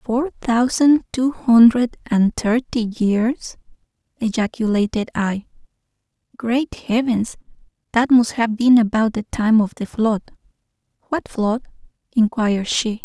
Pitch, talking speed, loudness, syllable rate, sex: 230 Hz, 115 wpm, -19 LUFS, 3.8 syllables/s, female